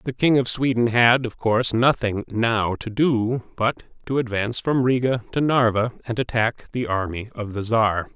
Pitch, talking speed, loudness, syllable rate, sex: 115 Hz, 185 wpm, -21 LUFS, 4.7 syllables/s, male